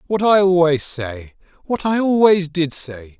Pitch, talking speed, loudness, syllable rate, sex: 170 Hz, 170 wpm, -17 LUFS, 4.1 syllables/s, male